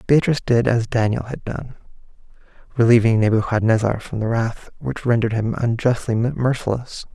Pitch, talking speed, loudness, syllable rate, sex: 115 Hz, 135 wpm, -20 LUFS, 5.3 syllables/s, male